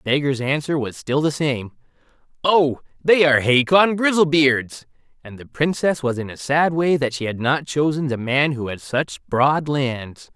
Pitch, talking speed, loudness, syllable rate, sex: 140 Hz, 185 wpm, -19 LUFS, 4.5 syllables/s, male